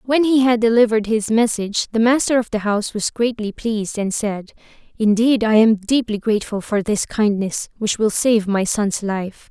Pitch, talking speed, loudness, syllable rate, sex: 220 Hz, 190 wpm, -18 LUFS, 5.0 syllables/s, female